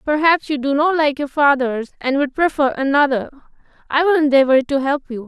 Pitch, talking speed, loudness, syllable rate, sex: 280 Hz, 195 wpm, -17 LUFS, 5.4 syllables/s, female